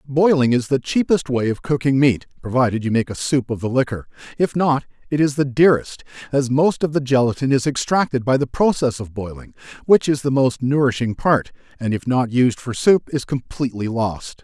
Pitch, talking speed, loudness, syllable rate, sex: 130 Hz, 205 wpm, -19 LUFS, 5.5 syllables/s, male